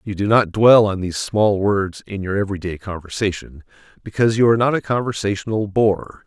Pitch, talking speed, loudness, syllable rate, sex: 100 Hz, 180 wpm, -18 LUFS, 5.8 syllables/s, male